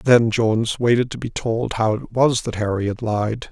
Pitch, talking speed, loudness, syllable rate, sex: 115 Hz, 220 wpm, -20 LUFS, 4.6 syllables/s, male